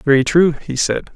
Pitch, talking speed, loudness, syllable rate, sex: 150 Hz, 205 wpm, -16 LUFS, 4.6 syllables/s, male